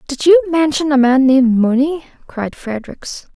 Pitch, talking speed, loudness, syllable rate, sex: 280 Hz, 160 wpm, -14 LUFS, 4.8 syllables/s, female